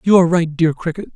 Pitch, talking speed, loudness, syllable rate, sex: 170 Hz, 260 wpm, -16 LUFS, 7.1 syllables/s, male